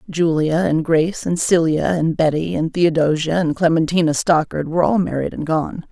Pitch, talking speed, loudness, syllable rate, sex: 165 Hz, 175 wpm, -18 LUFS, 5.1 syllables/s, female